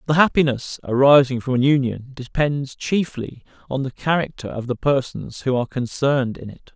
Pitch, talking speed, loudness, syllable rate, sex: 135 Hz, 170 wpm, -20 LUFS, 5.1 syllables/s, male